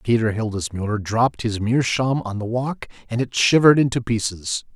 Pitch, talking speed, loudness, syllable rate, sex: 115 Hz, 165 wpm, -20 LUFS, 5.3 syllables/s, male